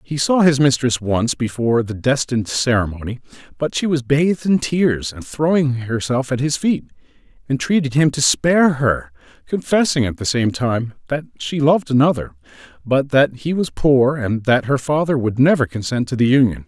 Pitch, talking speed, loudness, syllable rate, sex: 130 Hz, 180 wpm, -18 LUFS, 5.1 syllables/s, male